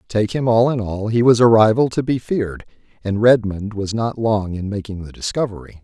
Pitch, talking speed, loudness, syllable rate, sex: 110 Hz, 215 wpm, -18 LUFS, 5.3 syllables/s, male